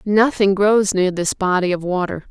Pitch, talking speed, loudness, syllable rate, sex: 195 Hz, 180 wpm, -17 LUFS, 4.5 syllables/s, female